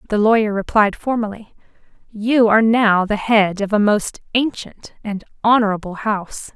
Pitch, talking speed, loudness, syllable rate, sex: 215 Hz, 145 wpm, -17 LUFS, 4.8 syllables/s, female